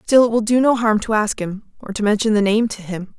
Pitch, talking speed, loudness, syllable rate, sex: 215 Hz, 300 wpm, -18 LUFS, 5.7 syllables/s, female